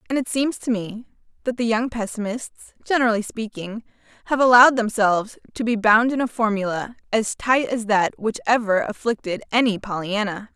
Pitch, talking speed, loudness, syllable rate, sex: 225 Hz, 165 wpm, -21 LUFS, 5.5 syllables/s, female